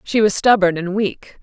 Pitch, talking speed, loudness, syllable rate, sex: 200 Hz, 210 wpm, -17 LUFS, 4.5 syllables/s, female